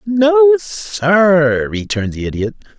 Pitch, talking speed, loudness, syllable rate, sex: 180 Hz, 110 wpm, -14 LUFS, 3.7 syllables/s, male